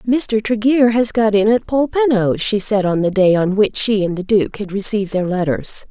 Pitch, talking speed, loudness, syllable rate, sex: 210 Hz, 225 wpm, -16 LUFS, 4.9 syllables/s, female